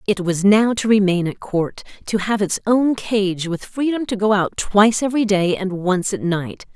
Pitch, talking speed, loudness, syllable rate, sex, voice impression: 200 Hz, 215 wpm, -19 LUFS, 4.7 syllables/s, female, feminine, middle-aged, tensed, powerful, raspy, intellectual, slightly friendly, lively, intense